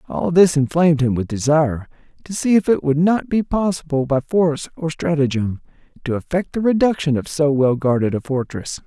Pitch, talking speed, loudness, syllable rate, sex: 150 Hz, 190 wpm, -18 LUFS, 5.4 syllables/s, male